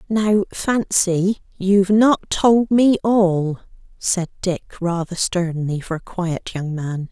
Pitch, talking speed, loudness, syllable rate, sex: 185 Hz, 135 wpm, -19 LUFS, 3.3 syllables/s, female